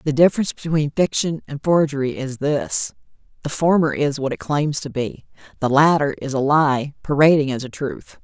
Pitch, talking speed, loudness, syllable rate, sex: 145 Hz, 180 wpm, -20 LUFS, 5.1 syllables/s, female